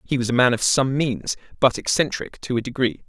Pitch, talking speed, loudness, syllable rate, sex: 130 Hz, 235 wpm, -21 LUFS, 5.5 syllables/s, male